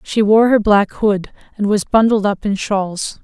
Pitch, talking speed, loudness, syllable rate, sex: 210 Hz, 205 wpm, -15 LUFS, 4.2 syllables/s, female